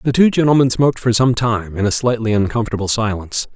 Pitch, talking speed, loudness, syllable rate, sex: 115 Hz, 200 wpm, -16 LUFS, 6.5 syllables/s, male